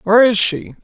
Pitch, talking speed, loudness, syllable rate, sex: 205 Hz, 215 wpm, -14 LUFS, 5.9 syllables/s, male